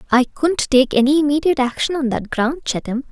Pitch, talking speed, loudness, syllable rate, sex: 275 Hz, 195 wpm, -17 LUFS, 5.9 syllables/s, female